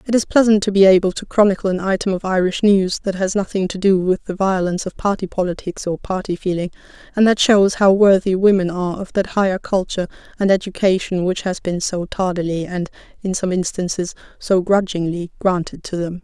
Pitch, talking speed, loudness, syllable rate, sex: 190 Hz, 200 wpm, -18 LUFS, 5.7 syllables/s, female